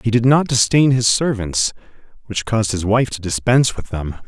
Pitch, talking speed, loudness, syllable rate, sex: 110 Hz, 195 wpm, -17 LUFS, 5.2 syllables/s, male